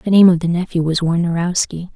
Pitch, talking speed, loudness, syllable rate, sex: 175 Hz, 215 wpm, -16 LUFS, 6.0 syllables/s, female